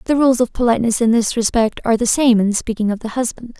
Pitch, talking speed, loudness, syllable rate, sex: 230 Hz, 250 wpm, -16 LUFS, 6.5 syllables/s, female